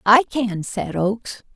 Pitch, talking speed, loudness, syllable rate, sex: 225 Hz, 155 wpm, -21 LUFS, 3.7 syllables/s, female